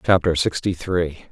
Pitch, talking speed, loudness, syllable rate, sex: 85 Hz, 135 wpm, -21 LUFS, 4.4 syllables/s, male